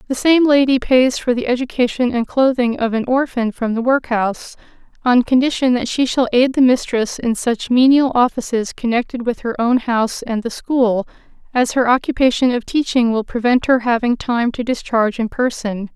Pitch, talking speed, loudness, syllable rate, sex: 245 Hz, 185 wpm, -17 LUFS, 5.1 syllables/s, female